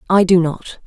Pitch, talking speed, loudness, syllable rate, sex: 175 Hz, 210 wpm, -15 LUFS, 4.8 syllables/s, female